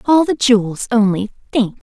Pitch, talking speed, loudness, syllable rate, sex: 230 Hz, 155 wpm, -16 LUFS, 4.8 syllables/s, female